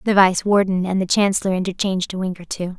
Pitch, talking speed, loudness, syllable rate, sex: 190 Hz, 235 wpm, -19 LUFS, 6.4 syllables/s, female